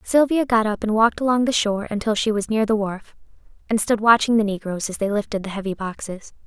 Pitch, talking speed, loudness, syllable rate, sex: 215 Hz, 230 wpm, -21 LUFS, 6.1 syllables/s, female